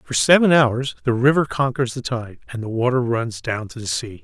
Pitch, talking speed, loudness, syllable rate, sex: 125 Hz, 210 wpm, -19 LUFS, 4.9 syllables/s, male